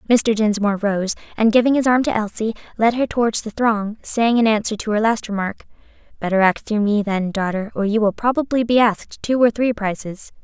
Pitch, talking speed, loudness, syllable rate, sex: 220 Hz, 215 wpm, -19 LUFS, 5.6 syllables/s, female